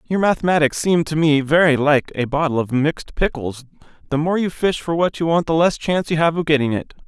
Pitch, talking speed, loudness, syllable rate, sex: 155 Hz, 240 wpm, -18 LUFS, 5.9 syllables/s, male